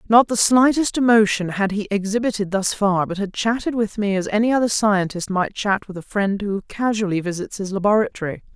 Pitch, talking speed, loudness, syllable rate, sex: 205 Hz, 195 wpm, -20 LUFS, 5.5 syllables/s, female